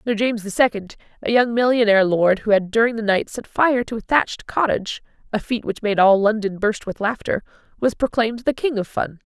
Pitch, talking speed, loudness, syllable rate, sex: 220 Hz, 205 wpm, -20 LUFS, 5.9 syllables/s, female